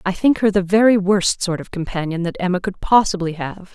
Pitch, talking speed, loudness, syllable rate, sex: 190 Hz, 225 wpm, -18 LUFS, 5.5 syllables/s, female